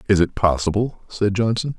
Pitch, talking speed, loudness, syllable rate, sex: 100 Hz, 170 wpm, -20 LUFS, 5.1 syllables/s, male